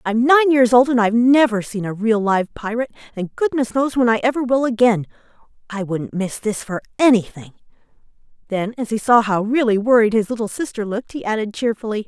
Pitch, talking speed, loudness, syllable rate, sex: 225 Hz, 195 wpm, -18 LUFS, 5.8 syllables/s, female